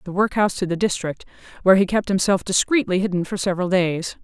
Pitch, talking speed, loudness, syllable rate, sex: 190 Hz, 200 wpm, -20 LUFS, 6.5 syllables/s, female